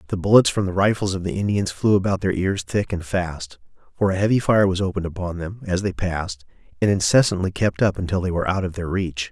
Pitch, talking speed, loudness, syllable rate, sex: 95 Hz, 240 wpm, -21 LUFS, 6.1 syllables/s, male